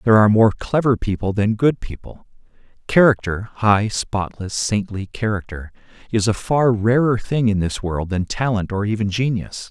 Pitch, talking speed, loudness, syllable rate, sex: 110 Hz, 150 wpm, -19 LUFS, 4.9 syllables/s, male